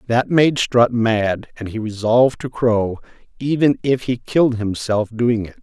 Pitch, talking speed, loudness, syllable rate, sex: 115 Hz, 170 wpm, -18 LUFS, 4.3 syllables/s, male